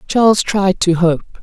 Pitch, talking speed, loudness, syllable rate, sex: 190 Hz, 170 wpm, -14 LUFS, 4.4 syllables/s, female